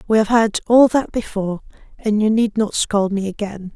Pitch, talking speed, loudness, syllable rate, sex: 210 Hz, 210 wpm, -18 LUFS, 5.0 syllables/s, female